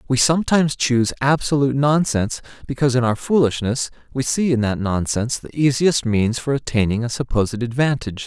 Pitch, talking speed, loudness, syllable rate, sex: 130 Hz, 160 wpm, -19 LUFS, 6.0 syllables/s, male